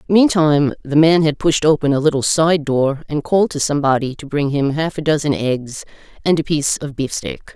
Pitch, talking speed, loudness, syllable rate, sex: 150 Hz, 205 wpm, -17 LUFS, 5.4 syllables/s, female